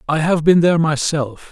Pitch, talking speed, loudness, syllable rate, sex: 155 Hz, 200 wpm, -16 LUFS, 5.2 syllables/s, male